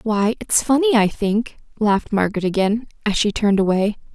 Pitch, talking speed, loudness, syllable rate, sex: 215 Hz, 175 wpm, -19 LUFS, 5.4 syllables/s, female